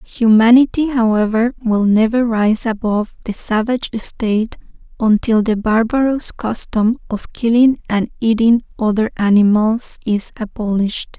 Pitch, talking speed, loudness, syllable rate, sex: 225 Hz, 115 wpm, -16 LUFS, 4.5 syllables/s, female